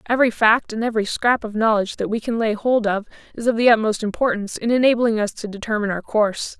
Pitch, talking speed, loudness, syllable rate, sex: 220 Hz, 225 wpm, -20 LUFS, 6.7 syllables/s, female